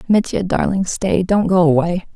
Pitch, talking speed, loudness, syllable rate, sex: 180 Hz, 165 wpm, -17 LUFS, 4.6 syllables/s, female